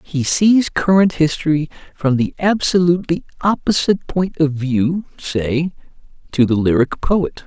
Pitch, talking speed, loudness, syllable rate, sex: 160 Hz, 130 wpm, -17 LUFS, 4.3 syllables/s, male